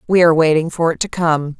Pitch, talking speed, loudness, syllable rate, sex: 165 Hz, 265 wpm, -15 LUFS, 6.4 syllables/s, female